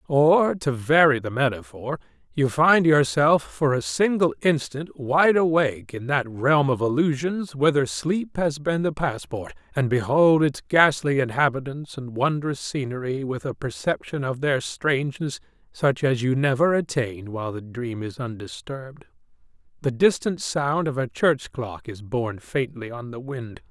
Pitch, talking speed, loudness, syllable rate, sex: 140 Hz, 155 wpm, -23 LUFS, 4.4 syllables/s, male